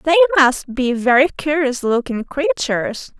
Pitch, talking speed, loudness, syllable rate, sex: 270 Hz, 130 wpm, -17 LUFS, 4.2 syllables/s, female